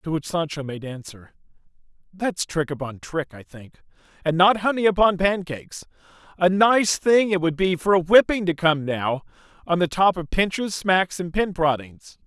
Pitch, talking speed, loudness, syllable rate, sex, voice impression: 170 Hz, 180 wpm, -21 LUFS, 4.7 syllables/s, male, masculine, very adult-like, intellectual, slightly refreshing, slightly unique